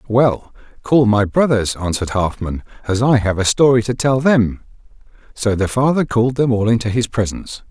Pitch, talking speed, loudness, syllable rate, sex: 115 Hz, 180 wpm, -16 LUFS, 5.3 syllables/s, male